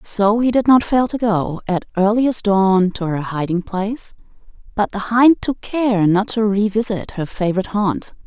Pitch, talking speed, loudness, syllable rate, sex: 210 Hz, 190 wpm, -17 LUFS, 4.5 syllables/s, female